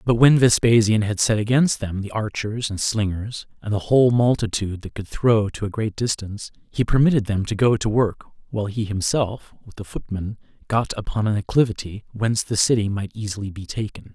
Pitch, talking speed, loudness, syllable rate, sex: 110 Hz, 195 wpm, -21 LUFS, 5.4 syllables/s, male